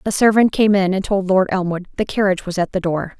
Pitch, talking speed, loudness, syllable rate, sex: 190 Hz, 265 wpm, -17 LUFS, 6.1 syllables/s, female